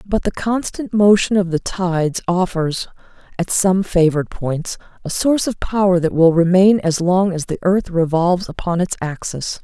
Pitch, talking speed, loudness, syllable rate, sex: 180 Hz, 175 wpm, -17 LUFS, 4.8 syllables/s, female